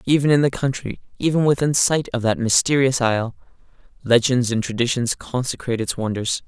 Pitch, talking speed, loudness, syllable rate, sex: 125 Hz, 160 wpm, -20 LUFS, 5.7 syllables/s, male